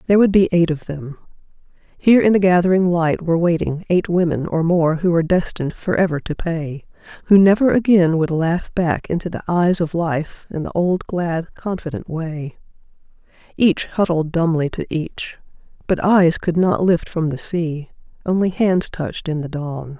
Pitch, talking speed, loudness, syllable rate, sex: 170 Hz, 175 wpm, -18 LUFS, 4.9 syllables/s, female